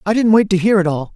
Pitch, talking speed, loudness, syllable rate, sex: 195 Hz, 365 wpm, -14 LUFS, 6.9 syllables/s, male